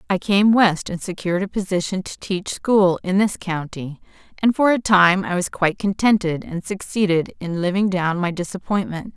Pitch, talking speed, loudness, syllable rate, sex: 190 Hz, 185 wpm, -20 LUFS, 5.0 syllables/s, female